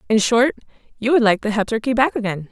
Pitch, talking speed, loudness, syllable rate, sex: 230 Hz, 215 wpm, -18 LUFS, 6.3 syllables/s, female